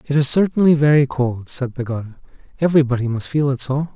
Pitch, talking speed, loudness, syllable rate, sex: 135 Hz, 180 wpm, -18 LUFS, 6.4 syllables/s, male